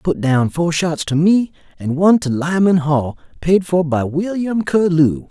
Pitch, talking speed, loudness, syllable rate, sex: 165 Hz, 180 wpm, -16 LUFS, 4.2 syllables/s, male